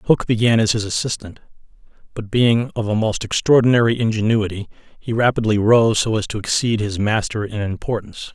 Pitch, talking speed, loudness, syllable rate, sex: 110 Hz, 165 wpm, -18 LUFS, 5.7 syllables/s, male